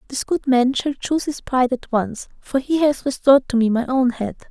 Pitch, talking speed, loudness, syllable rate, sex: 260 Hz, 240 wpm, -19 LUFS, 5.4 syllables/s, female